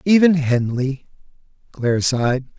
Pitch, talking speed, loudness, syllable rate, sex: 140 Hz, 95 wpm, -18 LUFS, 4.6 syllables/s, male